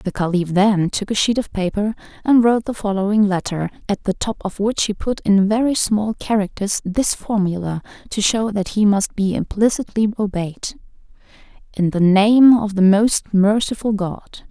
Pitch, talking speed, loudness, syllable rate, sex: 205 Hz, 170 wpm, -18 LUFS, 4.7 syllables/s, female